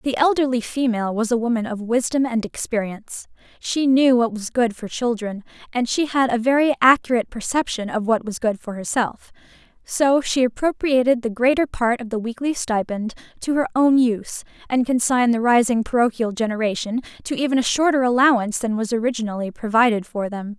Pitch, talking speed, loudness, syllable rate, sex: 240 Hz, 180 wpm, -20 LUFS, 5.6 syllables/s, female